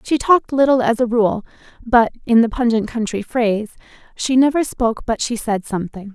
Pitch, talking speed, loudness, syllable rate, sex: 235 Hz, 185 wpm, -17 LUFS, 5.7 syllables/s, female